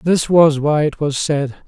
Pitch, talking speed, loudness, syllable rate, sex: 150 Hz, 215 wpm, -16 LUFS, 4.2 syllables/s, male